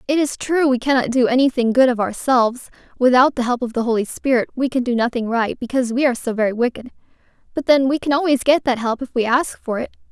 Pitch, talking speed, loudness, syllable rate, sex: 250 Hz, 245 wpm, -18 LUFS, 6.4 syllables/s, female